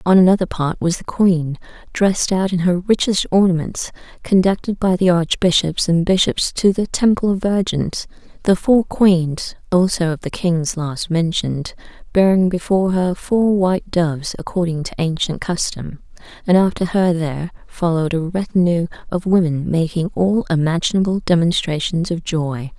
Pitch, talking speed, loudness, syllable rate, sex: 175 Hz, 150 wpm, -18 LUFS, 4.8 syllables/s, female